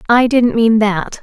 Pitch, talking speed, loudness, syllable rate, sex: 225 Hz, 195 wpm, -13 LUFS, 3.8 syllables/s, female